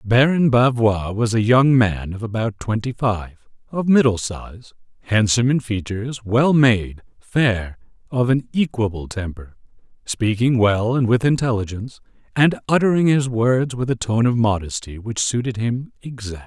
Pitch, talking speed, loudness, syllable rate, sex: 115 Hz, 150 wpm, -19 LUFS, 4.6 syllables/s, male